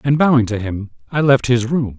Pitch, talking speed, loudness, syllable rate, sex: 125 Hz, 240 wpm, -16 LUFS, 5.3 syllables/s, male